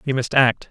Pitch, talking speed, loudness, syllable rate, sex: 130 Hz, 255 wpm, -18 LUFS, 5.1 syllables/s, male